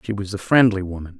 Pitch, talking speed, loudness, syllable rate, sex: 100 Hz, 250 wpm, -19 LUFS, 6.4 syllables/s, male